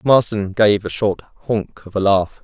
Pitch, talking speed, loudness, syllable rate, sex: 100 Hz, 195 wpm, -18 LUFS, 4.3 syllables/s, male